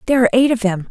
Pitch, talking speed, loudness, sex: 230 Hz, 330 wpm, -15 LUFS, female